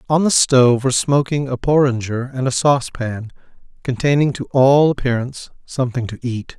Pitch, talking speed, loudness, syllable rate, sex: 130 Hz, 155 wpm, -17 LUFS, 5.4 syllables/s, male